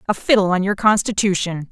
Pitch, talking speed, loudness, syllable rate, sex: 195 Hz, 175 wpm, -17 LUFS, 5.9 syllables/s, female